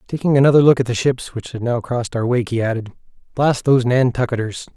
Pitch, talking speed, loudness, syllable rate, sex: 125 Hz, 215 wpm, -18 LUFS, 6.3 syllables/s, male